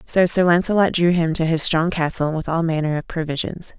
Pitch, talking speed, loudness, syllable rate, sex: 165 Hz, 220 wpm, -19 LUFS, 5.5 syllables/s, female